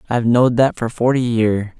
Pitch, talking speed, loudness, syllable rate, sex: 120 Hz, 200 wpm, -16 LUFS, 5.7 syllables/s, male